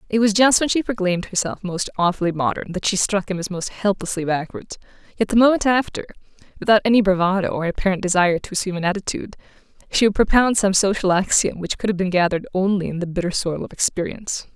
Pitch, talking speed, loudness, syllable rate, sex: 190 Hz, 205 wpm, -20 LUFS, 6.7 syllables/s, female